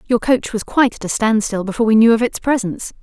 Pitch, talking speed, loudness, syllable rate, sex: 225 Hz, 260 wpm, -16 LUFS, 6.8 syllables/s, female